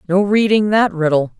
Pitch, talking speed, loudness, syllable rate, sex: 190 Hz, 170 wpm, -15 LUFS, 5.0 syllables/s, female